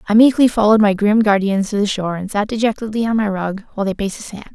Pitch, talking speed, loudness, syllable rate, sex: 210 Hz, 265 wpm, -16 LUFS, 7.2 syllables/s, female